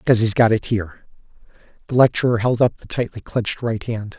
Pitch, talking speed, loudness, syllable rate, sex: 115 Hz, 200 wpm, -19 LUFS, 6.4 syllables/s, male